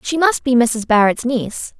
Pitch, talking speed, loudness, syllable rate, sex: 240 Hz, 200 wpm, -16 LUFS, 4.8 syllables/s, female